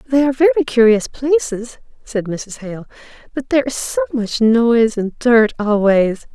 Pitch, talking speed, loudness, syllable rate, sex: 230 Hz, 160 wpm, -16 LUFS, 4.6 syllables/s, female